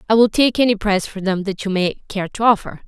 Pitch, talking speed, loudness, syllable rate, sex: 205 Hz, 270 wpm, -18 LUFS, 6.1 syllables/s, female